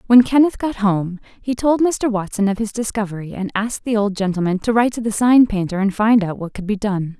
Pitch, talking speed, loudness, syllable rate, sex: 215 Hz, 240 wpm, -18 LUFS, 5.6 syllables/s, female